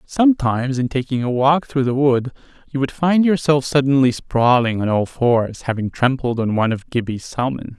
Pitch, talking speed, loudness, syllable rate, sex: 130 Hz, 185 wpm, -18 LUFS, 5.1 syllables/s, male